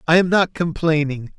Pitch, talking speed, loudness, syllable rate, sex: 160 Hz, 175 wpm, -18 LUFS, 4.9 syllables/s, male